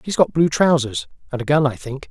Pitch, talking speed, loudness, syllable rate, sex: 140 Hz, 255 wpm, -19 LUFS, 5.6 syllables/s, male